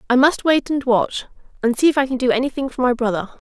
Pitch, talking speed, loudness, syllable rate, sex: 255 Hz, 260 wpm, -19 LUFS, 6.3 syllables/s, female